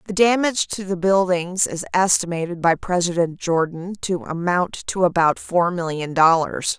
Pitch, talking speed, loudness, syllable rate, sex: 175 Hz, 150 wpm, -20 LUFS, 4.6 syllables/s, female